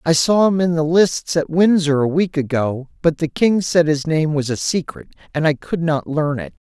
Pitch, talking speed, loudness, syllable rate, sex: 160 Hz, 235 wpm, -18 LUFS, 4.8 syllables/s, male